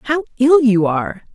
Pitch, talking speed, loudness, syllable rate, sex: 240 Hz, 180 wpm, -15 LUFS, 4.7 syllables/s, female